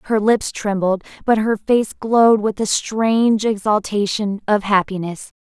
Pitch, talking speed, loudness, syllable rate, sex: 210 Hz, 145 wpm, -18 LUFS, 4.2 syllables/s, female